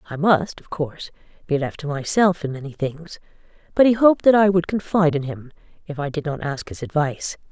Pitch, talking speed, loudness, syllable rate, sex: 165 Hz, 215 wpm, -21 LUFS, 5.9 syllables/s, female